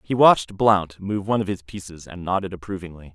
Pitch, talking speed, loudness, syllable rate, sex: 95 Hz, 210 wpm, -22 LUFS, 6.0 syllables/s, male